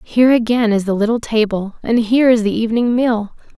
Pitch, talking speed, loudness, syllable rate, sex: 225 Hz, 200 wpm, -15 LUFS, 5.9 syllables/s, female